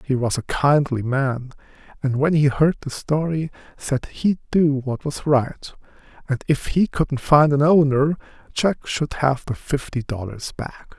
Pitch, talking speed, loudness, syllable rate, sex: 140 Hz, 170 wpm, -21 LUFS, 4.0 syllables/s, male